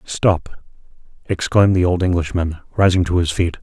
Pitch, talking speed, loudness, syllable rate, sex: 90 Hz, 150 wpm, -18 LUFS, 5.0 syllables/s, male